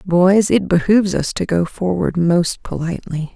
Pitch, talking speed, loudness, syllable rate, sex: 180 Hz, 160 wpm, -17 LUFS, 4.6 syllables/s, female